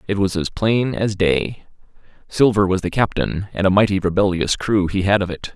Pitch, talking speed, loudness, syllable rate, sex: 95 Hz, 205 wpm, -19 LUFS, 5.1 syllables/s, male